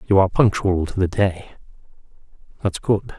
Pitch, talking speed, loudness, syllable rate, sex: 95 Hz, 150 wpm, -20 LUFS, 5.6 syllables/s, male